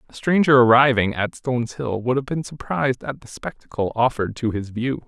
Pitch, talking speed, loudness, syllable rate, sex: 125 Hz, 200 wpm, -20 LUFS, 5.5 syllables/s, male